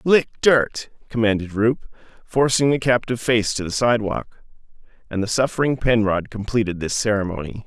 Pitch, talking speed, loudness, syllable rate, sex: 115 Hz, 140 wpm, -20 LUFS, 5.3 syllables/s, male